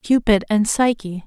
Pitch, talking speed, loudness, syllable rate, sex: 215 Hz, 140 wpm, -18 LUFS, 4.5 syllables/s, female